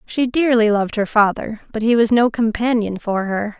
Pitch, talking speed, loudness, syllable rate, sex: 225 Hz, 200 wpm, -17 LUFS, 5.0 syllables/s, female